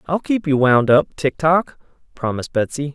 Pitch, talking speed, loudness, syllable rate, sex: 145 Hz, 185 wpm, -18 LUFS, 5.1 syllables/s, male